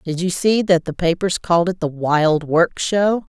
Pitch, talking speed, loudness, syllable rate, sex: 175 Hz, 215 wpm, -18 LUFS, 4.4 syllables/s, female